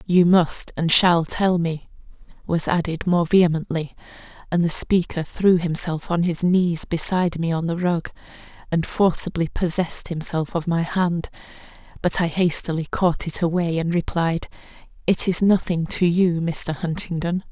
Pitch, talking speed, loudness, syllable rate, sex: 170 Hz, 150 wpm, -21 LUFS, 4.6 syllables/s, female